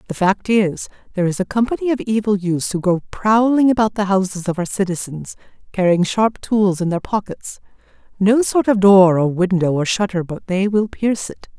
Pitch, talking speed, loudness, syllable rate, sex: 195 Hz, 190 wpm, -17 LUFS, 5.2 syllables/s, female